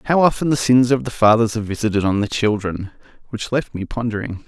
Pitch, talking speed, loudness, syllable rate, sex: 115 Hz, 215 wpm, -18 LUFS, 6.1 syllables/s, male